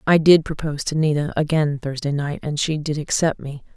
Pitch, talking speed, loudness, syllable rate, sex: 150 Hz, 205 wpm, -20 LUFS, 5.5 syllables/s, female